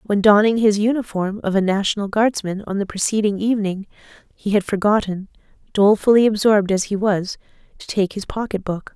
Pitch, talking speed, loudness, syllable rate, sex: 205 Hz, 165 wpm, -19 LUFS, 5.7 syllables/s, female